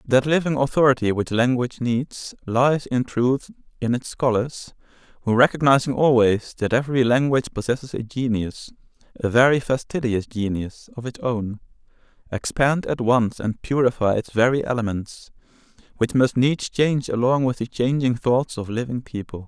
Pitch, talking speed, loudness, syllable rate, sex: 125 Hz, 150 wpm, -21 LUFS, 4.9 syllables/s, male